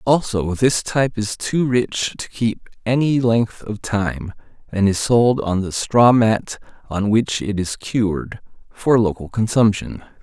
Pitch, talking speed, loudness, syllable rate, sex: 110 Hz, 160 wpm, -19 LUFS, 3.9 syllables/s, male